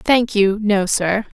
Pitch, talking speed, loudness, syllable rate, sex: 205 Hz, 175 wpm, -17 LUFS, 3.3 syllables/s, female